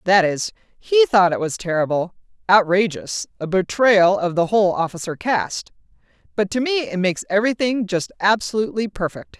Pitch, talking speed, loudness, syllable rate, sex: 200 Hz, 135 wpm, -19 LUFS, 5.4 syllables/s, female